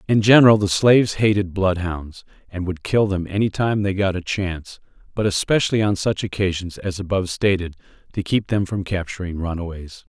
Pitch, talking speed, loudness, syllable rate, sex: 95 Hz, 175 wpm, -20 LUFS, 5.5 syllables/s, male